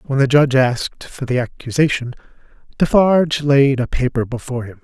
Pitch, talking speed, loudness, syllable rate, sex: 135 Hz, 160 wpm, -17 LUFS, 5.6 syllables/s, male